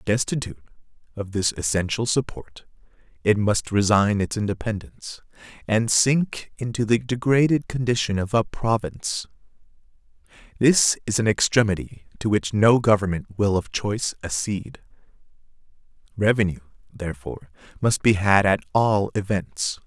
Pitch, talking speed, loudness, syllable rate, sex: 105 Hz, 120 wpm, -22 LUFS, 4.9 syllables/s, male